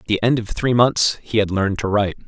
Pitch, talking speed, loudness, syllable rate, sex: 105 Hz, 290 wpm, -19 LUFS, 6.2 syllables/s, male